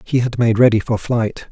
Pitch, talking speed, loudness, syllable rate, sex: 115 Hz, 240 wpm, -16 LUFS, 5.0 syllables/s, male